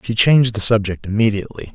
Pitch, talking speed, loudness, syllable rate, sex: 110 Hz, 170 wpm, -16 LUFS, 6.7 syllables/s, male